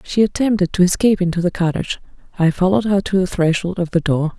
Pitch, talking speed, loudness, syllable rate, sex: 185 Hz, 220 wpm, -17 LUFS, 6.7 syllables/s, female